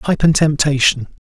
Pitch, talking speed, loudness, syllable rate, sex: 145 Hz, 145 wpm, -14 LUFS, 5.6 syllables/s, male